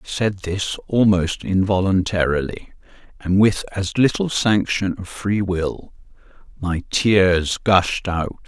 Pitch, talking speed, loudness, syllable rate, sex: 95 Hz, 120 wpm, -19 LUFS, 3.6 syllables/s, male